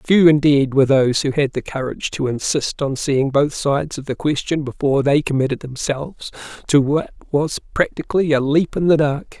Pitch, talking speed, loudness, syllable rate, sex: 140 Hz, 190 wpm, -18 LUFS, 5.5 syllables/s, male